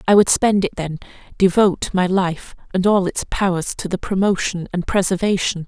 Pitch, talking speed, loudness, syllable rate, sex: 185 Hz, 160 wpm, -19 LUFS, 5.1 syllables/s, female